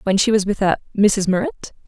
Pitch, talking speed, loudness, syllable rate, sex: 195 Hz, 225 wpm, -18 LUFS, 6.3 syllables/s, female